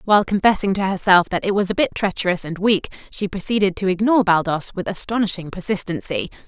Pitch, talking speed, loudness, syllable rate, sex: 195 Hz, 185 wpm, -19 LUFS, 6.3 syllables/s, female